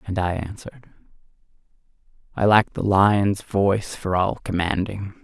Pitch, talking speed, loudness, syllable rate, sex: 100 Hz, 125 wpm, -21 LUFS, 4.5 syllables/s, male